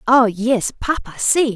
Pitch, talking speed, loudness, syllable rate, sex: 240 Hz, 155 wpm, -18 LUFS, 3.9 syllables/s, female